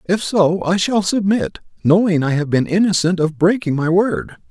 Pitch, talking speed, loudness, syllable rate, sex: 180 Hz, 185 wpm, -17 LUFS, 4.7 syllables/s, male